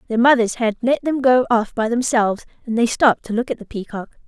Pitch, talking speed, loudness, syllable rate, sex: 235 Hz, 240 wpm, -18 LUFS, 6.0 syllables/s, female